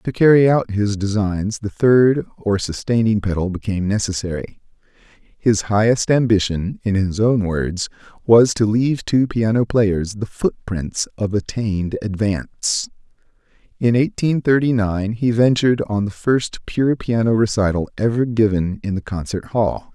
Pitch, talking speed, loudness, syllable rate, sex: 110 Hz, 145 wpm, -18 LUFS, 4.4 syllables/s, male